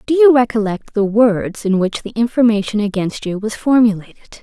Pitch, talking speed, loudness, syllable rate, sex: 220 Hz, 175 wpm, -16 LUFS, 5.4 syllables/s, female